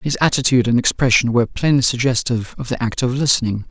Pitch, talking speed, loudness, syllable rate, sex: 125 Hz, 195 wpm, -17 LUFS, 6.6 syllables/s, male